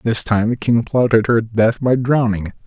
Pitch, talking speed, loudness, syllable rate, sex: 115 Hz, 200 wpm, -16 LUFS, 4.5 syllables/s, male